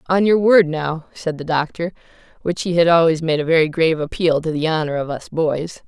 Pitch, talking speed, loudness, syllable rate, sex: 165 Hz, 215 wpm, -18 LUFS, 5.5 syllables/s, female